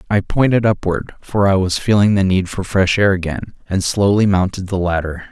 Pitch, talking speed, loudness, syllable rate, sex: 95 Hz, 205 wpm, -16 LUFS, 5.1 syllables/s, male